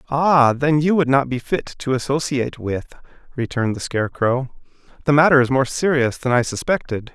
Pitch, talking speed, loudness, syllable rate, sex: 135 Hz, 175 wpm, -19 LUFS, 5.4 syllables/s, male